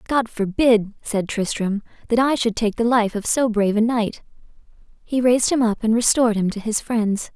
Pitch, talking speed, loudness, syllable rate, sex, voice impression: 225 Hz, 205 wpm, -20 LUFS, 5.1 syllables/s, female, feminine, adult-like, relaxed, slightly powerful, bright, soft, slightly fluent, intellectual, calm, slightly friendly, reassuring, elegant, slightly lively, kind, modest